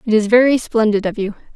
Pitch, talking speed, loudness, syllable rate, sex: 220 Hz, 230 wpm, -16 LUFS, 6.2 syllables/s, female